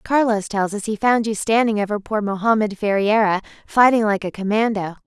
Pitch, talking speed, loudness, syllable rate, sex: 210 Hz, 180 wpm, -19 LUFS, 5.4 syllables/s, female